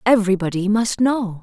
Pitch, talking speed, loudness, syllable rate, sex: 210 Hz, 125 wpm, -18 LUFS, 5.3 syllables/s, female